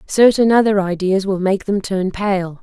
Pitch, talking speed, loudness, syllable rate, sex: 195 Hz, 185 wpm, -16 LUFS, 4.4 syllables/s, female